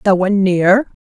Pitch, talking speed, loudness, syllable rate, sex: 195 Hz, 175 wpm, -14 LUFS, 4.9 syllables/s, female